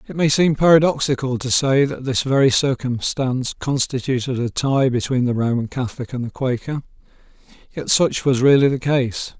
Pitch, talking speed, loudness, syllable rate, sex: 135 Hz, 165 wpm, -19 LUFS, 5.2 syllables/s, male